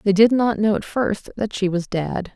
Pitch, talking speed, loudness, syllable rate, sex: 205 Hz, 255 wpm, -20 LUFS, 4.6 syllables/s, female